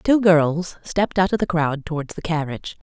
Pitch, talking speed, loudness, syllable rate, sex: 170 Hz, 205 wpm, -21 LUFS, 5.3 syllables/s, female